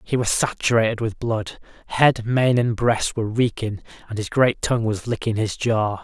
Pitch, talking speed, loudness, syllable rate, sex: 115 Hz, 190 wpm, -21 LUFS, 4.9 syllables/s, male